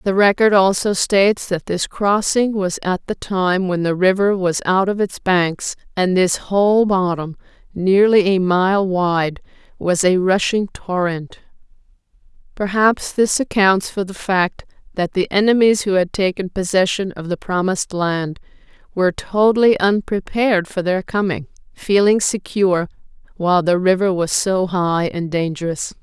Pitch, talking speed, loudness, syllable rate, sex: 190 Hz, 150 wpm, -17 LUFS, 4.4 syllables/s, female